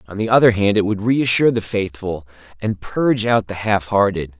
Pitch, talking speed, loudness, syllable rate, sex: 105 Hz, 205 wpm, -18 LUFS, 5.4 syllables/s, male